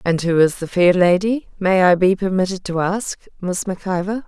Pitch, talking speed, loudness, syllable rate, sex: 185 Hz, 210 wpm, -18 LUFS, 4.9 syllables/s, female